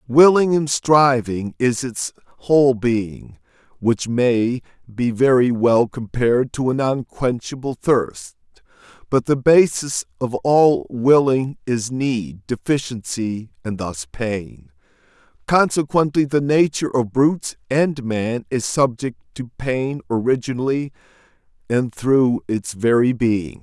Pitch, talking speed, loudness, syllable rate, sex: 125 Hz, 115 wpm, -19 LUFS, 3.7 syllables/s, male